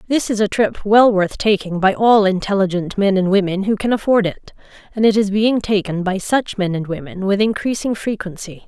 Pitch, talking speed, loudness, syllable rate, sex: 200 Hz, 205 wpm, -17 LUFS, 5.2 syllables/s, female